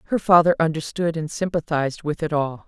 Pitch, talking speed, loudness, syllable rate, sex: 160 Hz, 180 wpm, -21 LUFS, 5.9 syllables/s, female